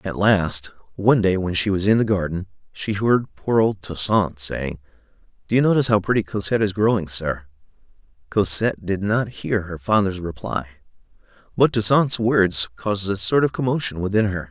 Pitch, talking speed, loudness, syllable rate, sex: 100 Hz, 175 wpm, -21 LUFS, 5.2 syllables/s, male